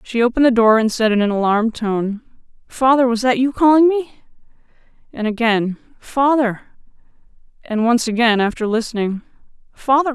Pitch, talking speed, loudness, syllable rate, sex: 235 Hz, 150 wpm, -17 LUFS, 5.4 syllables/s, female